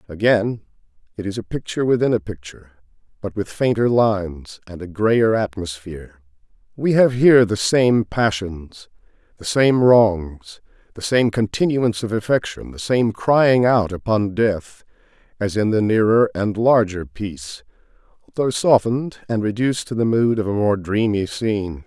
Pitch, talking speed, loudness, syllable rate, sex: 105 Hz, 150 wpm, -19 LUFS, 4.6 syllables/s, male